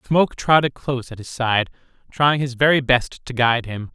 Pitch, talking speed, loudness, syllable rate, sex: 130 Hz, 200 wpm, -19 LUFS, 5.2 syllables/s, male